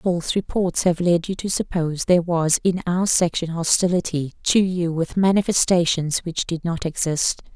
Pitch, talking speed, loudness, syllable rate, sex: 175 Hz, 165 wpm, -21 LUFS, 4.9 syllables/s, female